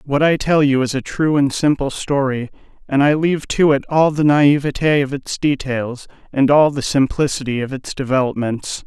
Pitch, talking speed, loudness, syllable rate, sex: 140 Hz, 190 wpm, -17 LUFS, 4.9 syllables/s, male